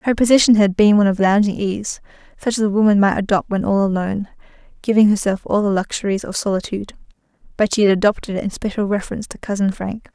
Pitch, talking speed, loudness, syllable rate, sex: 205 Hz, 200 wpm, -18 LUFS, 6.7 syllables/s, female